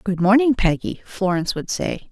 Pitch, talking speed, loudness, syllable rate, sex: 200 Hz, 170 wpm, -20 LUFS, 5.2 syllables/s, female